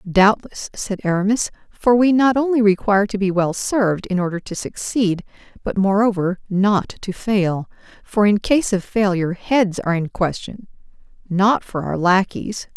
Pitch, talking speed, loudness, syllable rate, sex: 200 Hz, 160 wpm, -19 LUFS, 4.6 syllables/s, female